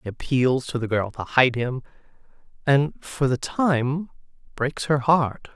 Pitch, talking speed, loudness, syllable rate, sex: 135 Hz, 160 wpm, -23 LUFS, 3.8 syllables/s, male